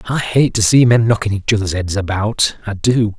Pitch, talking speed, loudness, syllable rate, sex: 110 Hz, 205 wpm, -15 LUFS, 5.1 syllables/s, male